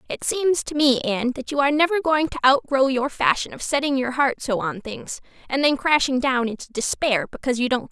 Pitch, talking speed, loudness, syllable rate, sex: 265 Hz, 245 wpm, -21 LUFS, 5.9 syllables/s, female